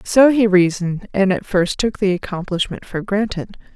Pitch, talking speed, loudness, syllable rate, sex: 195 Hz, 175 wpm, -18 LUFS, 4.9 syllables/s, female